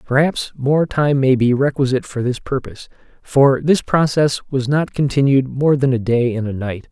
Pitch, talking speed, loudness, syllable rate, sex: 135 Hz, 190 wpm, -17 LUFS, 4.9 syllables/s, male